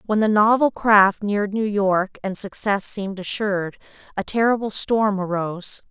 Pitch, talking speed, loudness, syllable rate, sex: 205 Hz, 155 wpm, -20 LUFS, 4.8 syllables/s, female